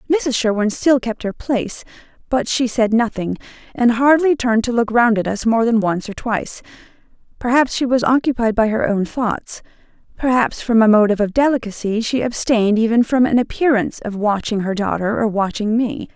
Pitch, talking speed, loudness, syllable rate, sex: 230 Hz, 185 wpm, -17 LUFS, 5.4 syllables/s, female